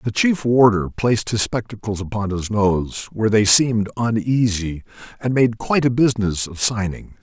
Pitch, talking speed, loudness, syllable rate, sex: 110 Hz, 165 wpm, -19 LUFS, 5.1 syllables/s, male